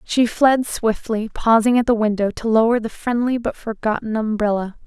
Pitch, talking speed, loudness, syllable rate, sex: 225 Hz, 175 wpm, -19 LUFS, 4.9 syllables/s, female